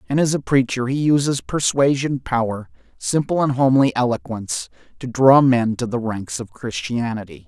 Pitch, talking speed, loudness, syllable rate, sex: 130 Hz, 160 wpm, -19 LUFS, 5.1 syllables/s, male